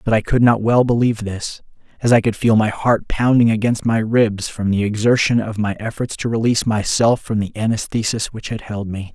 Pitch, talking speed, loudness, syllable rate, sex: 110 Hz, 215 wpm, -18 LUFS, 5.3 syllables/s, male